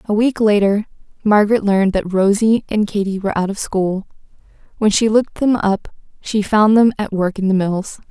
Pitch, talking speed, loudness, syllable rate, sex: 205 Hz, 190 wpm, -16 LUFS, 5.3 syllables/s, female